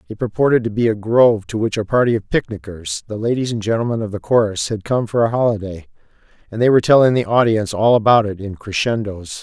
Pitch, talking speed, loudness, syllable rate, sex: 110 Hz, 225 wpm, -17 LUFS, 6.3 syllables/s, male